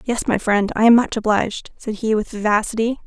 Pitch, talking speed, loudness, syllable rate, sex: 220 Hz, 215 wpm, -18 LUFS, 5.6 syllables/s, female